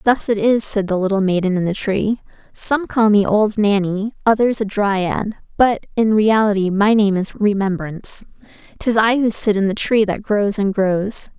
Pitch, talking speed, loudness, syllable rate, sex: 205 Hz, 190 wpm, -17 LUFS, 4.5 syllables/s, female